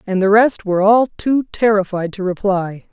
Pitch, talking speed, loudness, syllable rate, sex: 200 Hz, 185 wpm, -16 LUFS, 5.0 syllables/s, female